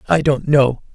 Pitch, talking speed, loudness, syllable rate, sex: 140 Hz, 190 wpm, -16 LUFS, 4.3 syllables/s, male